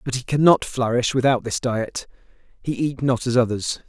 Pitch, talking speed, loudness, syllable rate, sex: 125 Hz, 185 wpm, -21 LUFS, 5.1 syllables/s, male